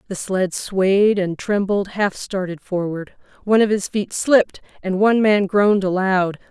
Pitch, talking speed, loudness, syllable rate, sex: 195 Hz, 165 wpm, -19 LUFS, 4.5 syllables/s, female